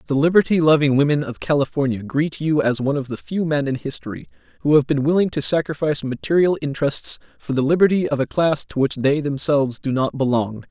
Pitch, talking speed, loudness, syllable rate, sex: 145 Hz, 205 wpm, -20 LUFS, 6.0 syllables/s, male